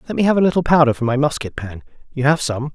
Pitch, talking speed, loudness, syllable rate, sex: 140 Hz, 260 wpm, -17 LUFS, 7.0 syllables/s, male